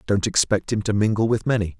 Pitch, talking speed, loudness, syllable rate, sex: 105 Hz, 235 wpm, -21 LUFS, 6.1 syllables/s, male